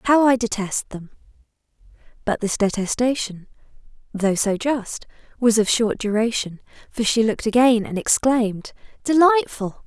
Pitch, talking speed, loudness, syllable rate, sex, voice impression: 225 Hz, 130 wpm, -20 LUFS, 4.6 syllables/s, female, feminine, adult-like, slightly relaxed, soft, fluent, slightly raspy, slightly calm, friendly, reassuring, elegant, kind, modest